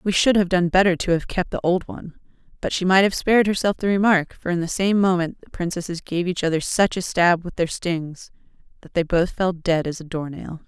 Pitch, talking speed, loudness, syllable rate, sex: 180 Hz, 245 wpm, -21 LUFS, 5.6 syllables/s, female